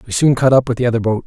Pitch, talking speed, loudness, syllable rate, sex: 120 Hz, 380 wpm, -15 LUFS, 8.0 syllables/s, male